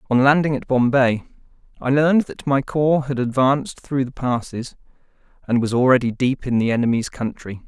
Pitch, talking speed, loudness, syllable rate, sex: 130 Hz, 170 wpm, -19 LUFS, 5.3 syllables/s, male